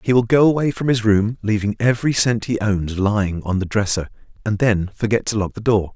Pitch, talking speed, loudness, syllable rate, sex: 110 Hz, 220 wpm, -19 LUFS, 5.6 syllables/s, male